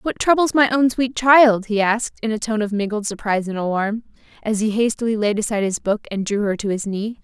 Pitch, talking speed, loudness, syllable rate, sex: 220 Hz, 240 wpm, -19 LUFS, 5.7 syllables/s, female